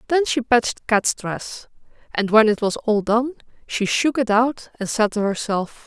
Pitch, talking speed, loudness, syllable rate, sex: 225 Hz, 195 wpm, -20 LUFS, 4.4 syllables/s, female